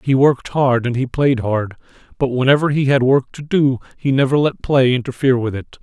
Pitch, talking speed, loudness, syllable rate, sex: 130 Hz, 215 wpm, -17 LUFS, 5.5 syllables/s, male